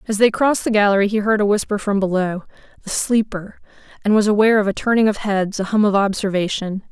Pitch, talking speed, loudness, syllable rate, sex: 205 Hz, 215 wpm, -18 LUFS, 6.3 syllables/s, female